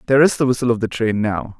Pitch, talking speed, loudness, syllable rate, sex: 115 Hz, 300 wpm, -18 LUFS, 7.1 syllables/s, male